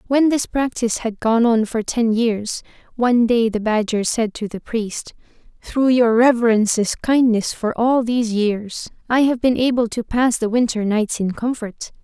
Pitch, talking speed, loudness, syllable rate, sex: 230 Hz, 180 wpm, -18 LUFS, 4.5 syllables/s, female